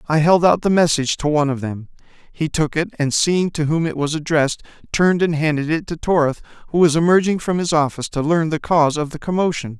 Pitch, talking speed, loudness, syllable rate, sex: 155 Hz, 235 wpm, -18 LUFS, 6.2 syllables/s, male